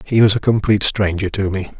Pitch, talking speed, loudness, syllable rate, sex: 100 Hz, 235 wpm, -16 LUFS, 6.1 syllables/s, male